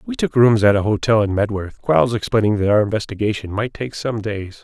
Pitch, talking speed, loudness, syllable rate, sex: 110 Hz, 220 wpm, -18 LUFS, 5.8 syllables/s, male